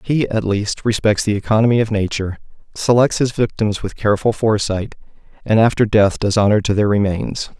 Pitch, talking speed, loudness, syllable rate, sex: 110 Hz, 175 wpm, -17 LUFS, 5.6 syllables/s, male